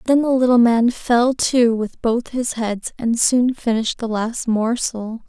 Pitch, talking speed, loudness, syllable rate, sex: 235 Hz, 180 wpm, -18 LUFS, 3.9 syllables/s, female